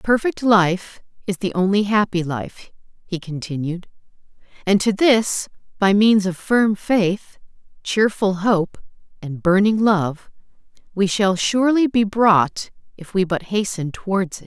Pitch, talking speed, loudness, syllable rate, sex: 200 Hz, 135 wpm, -19 LUFS, 4.0 syllables/s, female